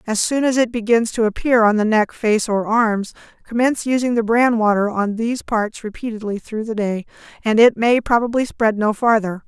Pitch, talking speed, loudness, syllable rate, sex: 225 Hz, 205 wpm, -18 LUFS, 5.2 syllables/s, female